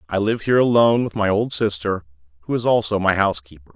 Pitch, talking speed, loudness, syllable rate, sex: 100 Hz, 210 wpm, -19 LUFS, 6.9 syllables/s, male